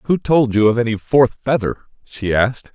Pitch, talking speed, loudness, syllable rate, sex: 120 Hz, 195 wpm, -17 LUFS, 4.9 syllables/s, male